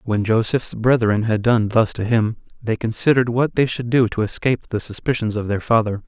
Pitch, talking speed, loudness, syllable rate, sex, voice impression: 115 Hz, 205 wpm, -19 LUFS, 5.4 syllables/s, male, masculine, adult-like, slightly weak, slightly sincere, calm, slightly friendly